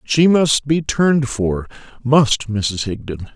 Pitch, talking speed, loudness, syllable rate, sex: 130 Hz, 160 wpm, -17 LUFS, 6.3 syllables/s, male